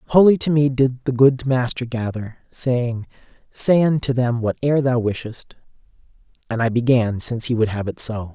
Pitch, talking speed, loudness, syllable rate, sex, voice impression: 125 Hz, 175 wpm, -19 LUFS, 4.9 syllables/s, male, masculine, adult-like, tensed, slightly powerful, clear, fluent, intellectual, refreshing, slightly sincere, friendly, lively, slightly kind